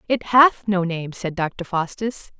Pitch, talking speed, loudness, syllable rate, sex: 195 Hz, 175 wpm, -20 LUFS, 3.8 syllables/s, female